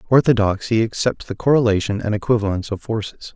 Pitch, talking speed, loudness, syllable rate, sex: 105 Hz, 145 wpm, -19 LUFS, 6.4 syllables/s, male